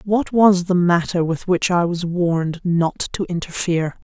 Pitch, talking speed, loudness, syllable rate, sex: 175 Hz, 175 wpm, -19 LUFS, 4.4 syllables/s, female